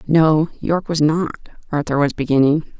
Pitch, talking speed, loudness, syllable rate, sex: 155 Hz, 150 wpm, -18 LUFS, 5.2 syllables/s, female